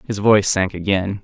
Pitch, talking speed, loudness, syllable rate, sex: 100 Hz, 195 wpm, -17 LUFS, 5.4 syllables/s, male